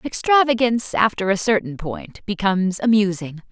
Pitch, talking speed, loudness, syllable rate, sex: 205 Hz, 120 wpm, -19 LUFS, 5.1 syllables/s, female